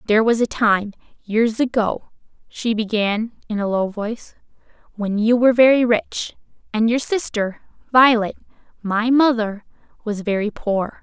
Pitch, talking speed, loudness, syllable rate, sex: 225 Hz, 140 wpm, -19 LUFS, 4.6 syllables/s, female